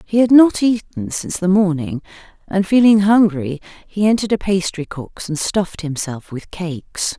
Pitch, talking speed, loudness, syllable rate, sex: 185 Hz, 160 wpm, -17 LUFS, 4.8 syllables/s, female